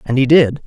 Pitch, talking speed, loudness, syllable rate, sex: 135 Hz, 270 wpm, -12 LUFS, 5.5 syllables/s, male